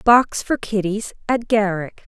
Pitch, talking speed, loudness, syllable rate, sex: 210 Hz, 140 wpm, -20 LUFS, 3.8 syllables/s, female